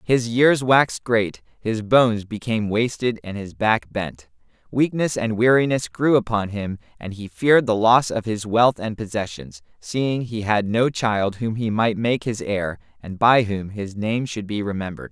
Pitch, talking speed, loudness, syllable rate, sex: 110 Hz, 185 wpm, -21 LUFS, 4.5 syllables/s, male